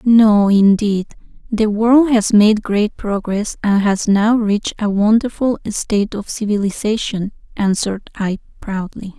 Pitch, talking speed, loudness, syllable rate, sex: 210 Hz, 130 wpm, -16 LUFS, 4.1 syllables/s, female